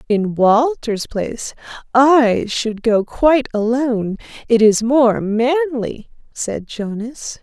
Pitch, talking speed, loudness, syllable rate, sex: 240 Hz, 115 wpm, -17 LUFS, 3.7 syllables/s, female